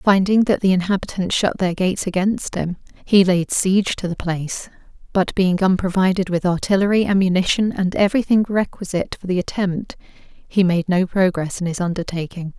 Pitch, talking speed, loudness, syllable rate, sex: 185 Hz, 165 wpm, -19 LUFS, 5.3 syllables/s, female